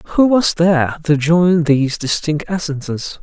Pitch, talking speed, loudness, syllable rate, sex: 160 Hz, 150 wpm, -15 LUFS, 4.6 syllables/s, male